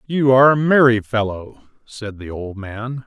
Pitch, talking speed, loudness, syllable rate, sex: 120 Hz, 175 wpm, -16 LUFS, 4.5 syllables/s, male